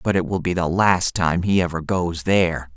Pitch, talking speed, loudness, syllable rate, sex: 90 Hz, 240 wpm, -20 LUFS, 4.9 syllables/s, male